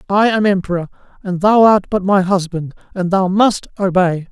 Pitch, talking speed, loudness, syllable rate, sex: 190 Hz, 180 wpm, -15 LUFS, 4.9 syllables/s, male